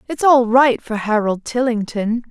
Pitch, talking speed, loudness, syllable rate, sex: 235 Hz, 155 wpm, -17 LUFS, 4.3 syllables/s, female